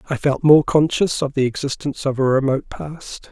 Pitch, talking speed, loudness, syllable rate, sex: 140 Hz, 200 wpm, -18 LUFS, 5.5 syllables/s, male